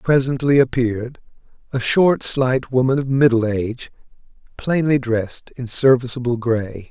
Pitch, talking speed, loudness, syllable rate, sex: 125 Hz, 120 wpm, -18 LUFS, 4.7 syllables/s, male